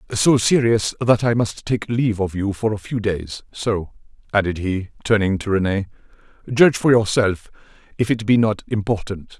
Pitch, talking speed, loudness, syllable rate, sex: 105 Hz, 170 wpm, -19 LUFS, 4.9 syllables/s, male